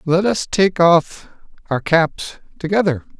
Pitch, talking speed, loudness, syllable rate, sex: 175 Hz, 130 wpm, -17 LUFS, 3.6 syllables/s, male